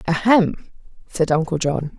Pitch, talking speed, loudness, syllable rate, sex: 175 Hz, 120 wpm, -19 LUFS, 4.1 syllables/s, female